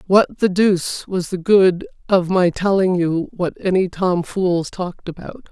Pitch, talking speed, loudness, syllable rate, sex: 185 Hz, 175 wpm, -18 LUFS, 4.3 syllables/s, female